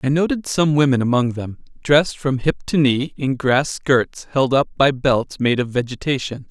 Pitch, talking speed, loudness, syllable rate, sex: 135 Hz, 195 wpm, -18 LUFS, 4.7 syllables/s, male